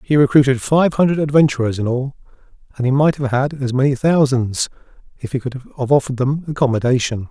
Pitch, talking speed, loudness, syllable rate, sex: 135 Hz, 180 wpm, -17 LUFS, 6.0 syllables/s, male